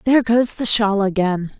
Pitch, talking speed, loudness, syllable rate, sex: 215 Hz, 190 wpm, -17 LUFS, 4.9 syllables/s, female